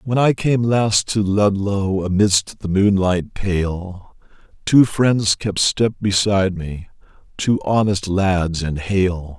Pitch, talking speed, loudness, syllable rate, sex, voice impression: 100 Hz, 135 wpm, -18 LUFS, 3.3 syllables/s, male, very masculine, very adult-like, old, very thick, slightly tensed, weak, dark, soft, slightly muffled, slightly fluent, slightly raspy, very cool, very intellectual, very sincere, very calm, very mature, very friendly, very reassuring, unique, very elegant, slightly wild, very sweet, slightly lively, very kind, slightly modest